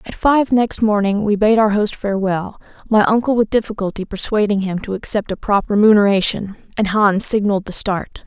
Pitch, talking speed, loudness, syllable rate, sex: 205 Hz, 180 wpm, -17 LUFS, 5.5 syllables/s, female